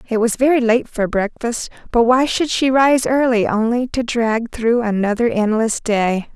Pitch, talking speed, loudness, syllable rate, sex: 235 Hz, 180 wpm, -17 LUFS, 4.4 syllables/s, female